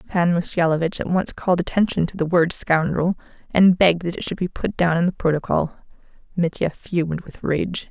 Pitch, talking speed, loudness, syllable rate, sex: 170 Hz, 190 wpm, -21 LUFS, 5.5 syllables/s, female